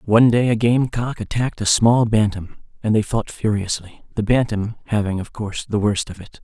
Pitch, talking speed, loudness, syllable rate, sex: 110 Hz, 205 wpm, -20 LUFS, 5.3 syllables/s, male